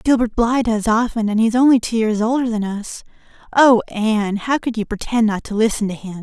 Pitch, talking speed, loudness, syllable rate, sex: 225 Hz, 220 wpm, -18 LUFS, 5.7 syllables/s, female